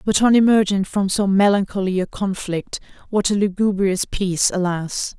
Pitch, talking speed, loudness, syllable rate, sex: 195 Hz, 150 wpm, -19 LUFS, 4.8 syllables/s, female